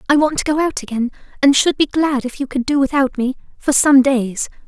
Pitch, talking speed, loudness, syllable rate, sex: 270 Hz, 245 wpm, -17 LUFS, 5.5 syllables/s, female